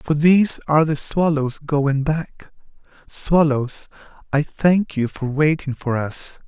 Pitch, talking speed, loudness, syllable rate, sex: 150 Hz, 140 wpm, -19 LUFS, 3.8 syllables/s, male